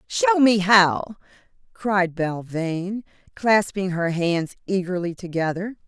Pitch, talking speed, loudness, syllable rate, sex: 190 Hz, 100 wpm, -22 LUFS, 3.7 syllables/s, female